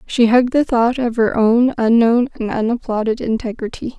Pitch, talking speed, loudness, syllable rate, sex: 235 Hz, 165 wpm, -16 LUFS, 5.1 syllables/s, female